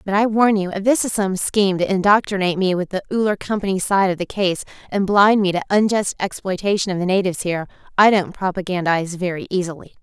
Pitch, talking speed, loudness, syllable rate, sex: 190 Hz, 210 wpm, -19 LUFS, 6.3 syllables/s, female